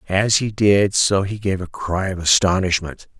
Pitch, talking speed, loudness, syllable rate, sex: 95 Hz, 190 wpm, -18 LUFS, 4.4 syllables/s, male